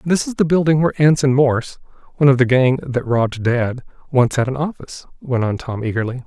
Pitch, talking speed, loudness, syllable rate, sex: 135 Hz, 210 wpm, -17 LUFS, 6.0 syllables/s, male